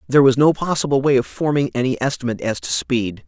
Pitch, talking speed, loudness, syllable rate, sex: 130 Hz, 220 wpm, -18 LUFS, 6.6 syllables/s, male